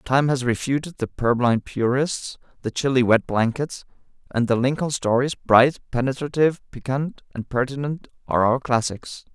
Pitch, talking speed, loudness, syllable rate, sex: 130 Hz, 140 wpm, -22 LUFS, 4.9 syllables/s, male